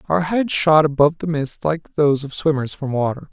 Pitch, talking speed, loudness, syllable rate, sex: 145 Hz, 215 wpm, -19 LUFS, 5.3 syllables/s, male